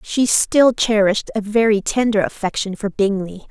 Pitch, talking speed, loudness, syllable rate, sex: 210 Hz, 155 wpm, -17 LUFS, 4.8 syllables/s, female